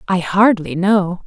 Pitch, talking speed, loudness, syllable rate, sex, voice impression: 190 Hz, 145 wpm, -15 LUFS, 3.6 syllables/s, female, feminine, adult-like, tensed, powerful, clear, slightly fluent, slightly raspy, friendly, elegant, slightly strict, slightly sharp